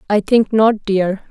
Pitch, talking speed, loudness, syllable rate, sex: 210 Hz, 185 wpm, -15 LUFS, 3.7 syllables/s, female